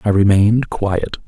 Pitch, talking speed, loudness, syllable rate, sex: 105 Hz, 140 wpm, -16 LUFS, 4.6 syllables/s, male